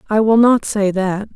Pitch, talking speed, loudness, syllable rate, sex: 210 Hz, 220 wpm, -15 LUFS, 4.5 syllables/s, female